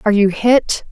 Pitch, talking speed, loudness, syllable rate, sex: 215 Hz, 195 wpm, -14 LUFS, 5.1 syllables/s, female